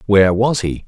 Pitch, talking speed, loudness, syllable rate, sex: 105 Hz, 205 wpm, -15 LUFS, 5.5 syllables/s, male